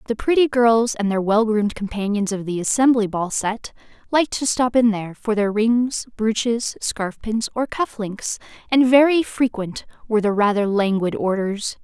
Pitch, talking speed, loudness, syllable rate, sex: 220 Hz, 175 wpm, -20 LUFS, 4.7 syllables/s, female